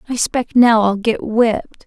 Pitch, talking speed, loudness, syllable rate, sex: 225 Hz, 195 wpm, -15 LUFS, 4.1 syllables/s, female